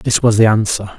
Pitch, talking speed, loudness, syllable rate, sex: 110 Hz, 245 wpm, -13 LUFS, 5.3 syllables/s, male